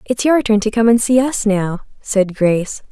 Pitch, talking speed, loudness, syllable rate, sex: 220 Hz, 225 wpm, -15 LUFS, 4.8 syllables/s, female